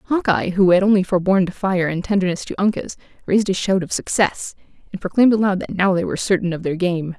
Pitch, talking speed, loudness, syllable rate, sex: 190 Hz, 225 wpm, -19 LUFS, 6.4 syllables/s, female